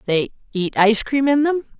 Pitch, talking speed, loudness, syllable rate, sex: 240 Hz, 200 wpm, -19 LUFS, 5.3 syllables/s, female